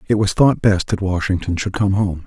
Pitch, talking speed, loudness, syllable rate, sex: 100 Hz, 240 wpm, -18 LUFS, 5.2 syllables/s, male